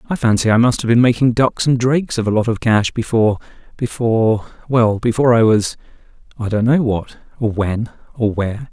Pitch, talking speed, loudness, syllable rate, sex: 115 Hz, 180 wpm, -16 LUFS, 5.7 syllables/s, male